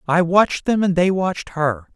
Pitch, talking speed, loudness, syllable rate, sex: 175 Hz, 215 wpm, -18 LUFS, 5.1 syllables/s, male